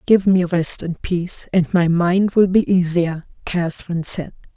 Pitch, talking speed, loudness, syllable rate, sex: 175 Hz, 170 wpm, -18 LUFS, 4.5 syllables/s, female